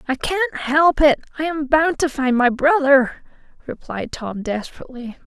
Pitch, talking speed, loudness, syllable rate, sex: 280 Hz, 145 wpm, -18 LUFS, 4.5 syllables/s, female